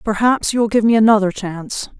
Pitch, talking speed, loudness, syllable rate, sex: 215 Hz, 210 wpm, -16 LUFS, 6.0 syllables/s, female